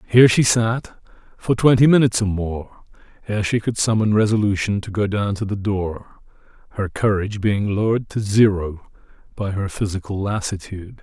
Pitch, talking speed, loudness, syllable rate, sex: 105 Hz, 160 wpm, -19 LUFS, 5.2 syllables/s, male